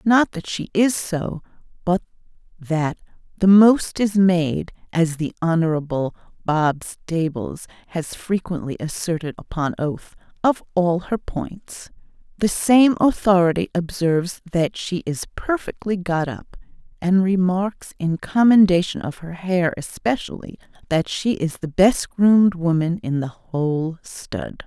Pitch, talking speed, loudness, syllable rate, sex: 175 Hz, 130 wpm, -20 LUFS, 4.0 syllables/s, female